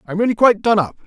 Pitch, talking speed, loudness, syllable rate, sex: 205 Hz, 280 wpm, -16 LUFS, 8.5 syllables/s, male